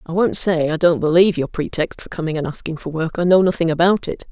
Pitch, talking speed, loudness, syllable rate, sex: 165 Hz, 265 wpm, -18 LUFS, 6.2 syllables/s, female